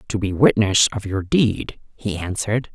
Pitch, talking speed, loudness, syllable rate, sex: 105 Hz, 175 wpm, -20 LUFS, 4.6 syllables/s, female